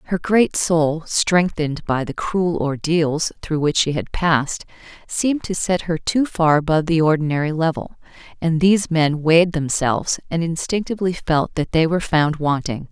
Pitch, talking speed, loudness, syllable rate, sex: 165 Hz, 165 wpm, -19 LUFS, 4.9 syllables/s, female